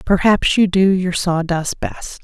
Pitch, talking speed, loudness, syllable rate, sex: 185 Hz, 160 wpm, -16 LUFS, 3.8 syllables/s, female